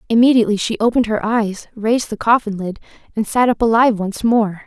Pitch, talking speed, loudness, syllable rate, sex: 220 Hz, 195 wpm, -16 LUFS, 6.1 syllables/s, female